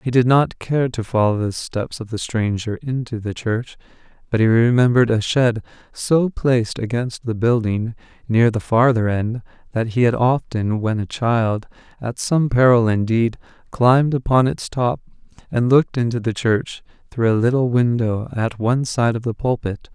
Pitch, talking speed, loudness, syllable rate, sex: 120 Hz, 175 wpm, -19 LUFS, 4.6 syllables/s, male